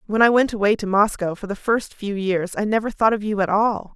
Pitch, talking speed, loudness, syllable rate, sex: 210 Hz, 275 wpm, -20 LUFS, 5.6 syllables/s, female